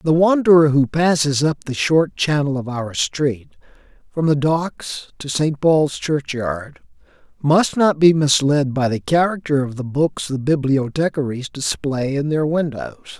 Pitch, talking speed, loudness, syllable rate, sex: 145 Hz, 155 wpm, -18 LUFS, 4.2 syllables/s, male